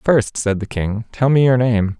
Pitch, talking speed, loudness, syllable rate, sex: 115 Hz, 240 wpm, -17 LUFS, 4.4 syllables/s, male